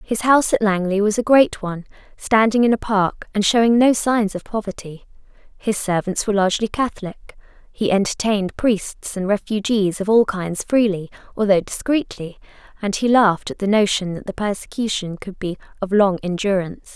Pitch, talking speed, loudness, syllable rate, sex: 205 Hz, 170 wpm, -19 LUFS, 5.3 syllables/s, female